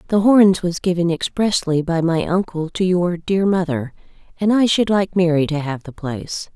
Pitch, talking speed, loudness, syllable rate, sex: 175 Hz, 190 wpm, -18 LUFS, 4.8 syllables/s, female